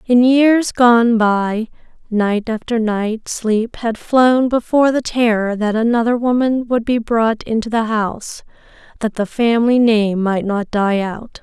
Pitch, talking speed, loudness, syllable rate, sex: 225 Hz, 160 wpm, -16 LUFS, 4.0 syllables/s, female